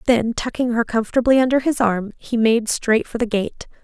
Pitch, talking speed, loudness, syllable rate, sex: 230 Hz, 205 wpm, -19 LUFS, 5.1 syllables/s, female